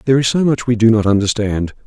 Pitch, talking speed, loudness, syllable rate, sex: 115 Hz, 260 wpm, -15 LUFS, 6.7 syllables/s, male